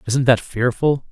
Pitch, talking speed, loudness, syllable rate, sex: 125 Hz, 160 wpm, -18 LUFS, 4.1 syllables/s, male